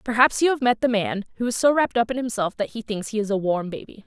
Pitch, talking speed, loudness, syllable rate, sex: 225 Hz, 310 wpm, -22 LUFS, 6.5 syllables/s, female